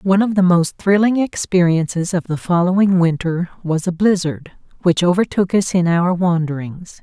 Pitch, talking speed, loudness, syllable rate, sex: 180 Hz, 160 wpm, -17 LUFS, 4.9 syllables/s, female